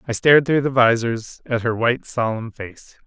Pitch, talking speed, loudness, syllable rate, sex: 120 Hz, 195 wpm, -19 LUFS, 5.0 syllables/s, male